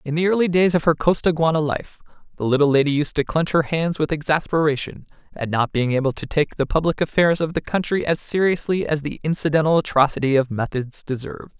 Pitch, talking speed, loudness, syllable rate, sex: 155 Hz, 200 wpm, -20 LUFS, 5.9 syllables/s, male